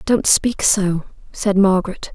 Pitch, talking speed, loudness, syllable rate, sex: 195 Hz, 140 wpm, -17 LUFS, 3.9 syllables/s, female